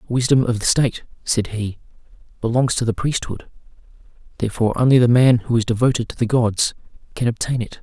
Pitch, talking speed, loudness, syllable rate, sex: 120 Hz, 175 wpm, -19 LUFS, 5.8 syllables/s, male